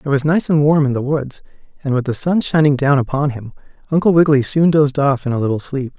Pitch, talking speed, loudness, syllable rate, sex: 140 Hz, 250 wpm, -16 LUFS, 6.3 syllables/s, male